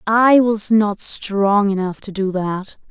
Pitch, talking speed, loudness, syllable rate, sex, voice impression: 205 Hz, 165 wpm, -17 LUFS, 3.4 syllables/s, female, very feminine, slightly young, slightly adult-like, thin, tensed, very powerful, slightly bright, slightly hard, very clear, fluent, slightly cute, cool, very intellectual, slightly refreshing, very sincere, very calm, slightly friendly, reassuring, unique, very elegant, sweet, slightly lively, very strict, slightly intense, very sharp